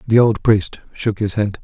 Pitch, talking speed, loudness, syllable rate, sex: 105 Hz, 220 wpm, -17 LUFS, 4.3 syllables/s, male